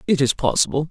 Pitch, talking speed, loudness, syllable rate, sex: 150 Hz, 200 wpm, -19 LUFS, 6.7 syllables/s, male